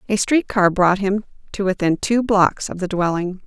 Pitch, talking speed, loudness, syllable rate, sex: 195 Hz, 210 wpm, -19 LUFS, 4.7 syllables/s, female